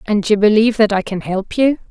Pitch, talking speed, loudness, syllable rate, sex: 210 Hz, 250 wpm, -15 LUFS, 5.9 syllables/s, female